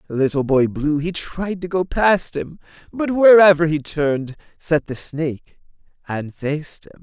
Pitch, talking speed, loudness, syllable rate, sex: 160 Hz, 160 wpm, -19 LUFS, 4.4 syllables/s, male